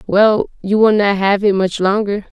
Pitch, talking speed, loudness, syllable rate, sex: 200 Hz, 200 wpm, -15 LUFS, 4.4 syllables/s, female